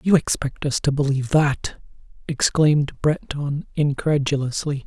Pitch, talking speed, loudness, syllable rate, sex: 145 Hz, 110 wpm, -21 LUFS, 4.5 syllables/s, male